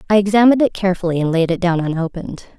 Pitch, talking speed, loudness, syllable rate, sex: 185 Hz, 210 wpm, -16 LUFS, 7.9 syllables/s, female